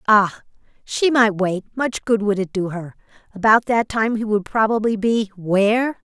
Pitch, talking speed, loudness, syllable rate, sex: 215 Hz, 155 wpm, -19 LUFS, 4.5 syllables/s, female